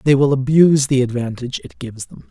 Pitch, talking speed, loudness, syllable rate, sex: 130 Hz, 210 wpm, -16 LUFS, 6.5 syllables/s, male